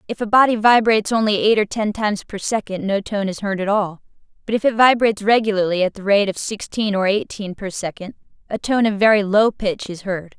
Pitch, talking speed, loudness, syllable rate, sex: 205 Hz, 225 wpm, -18 LUFS, 5.7 syllables/s, female